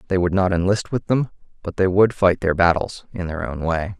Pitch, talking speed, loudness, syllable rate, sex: 90 Hz, 240 wpm, -20 LUFS, 5.3 syllables/s, male